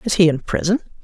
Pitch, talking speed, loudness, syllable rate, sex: 190 Hz, 230 wpm, -18 LUFS, 6.8 syllables/s, female